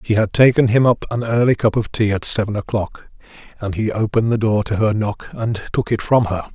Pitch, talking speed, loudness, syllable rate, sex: 110 Hz, 240 wpm, -18 LUFS, 5.6 syllables/s, male